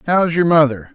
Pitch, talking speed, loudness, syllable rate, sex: 150 Hz, 190 wpm, -15 LUFS, 5.1 syllables/s, male